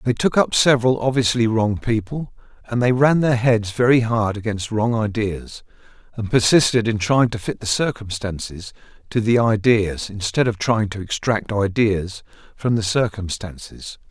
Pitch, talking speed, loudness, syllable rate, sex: 110 Hz, 155 wpm, -19 LUFS, 4.6 syllables/s, male